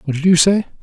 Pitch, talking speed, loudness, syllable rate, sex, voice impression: 170 Hz, 290 wpm, -14 LUFS, 7.7 syllables/s, male, very masculine, slightly old, muffled, sincere, calm, slightly mature, slightly wild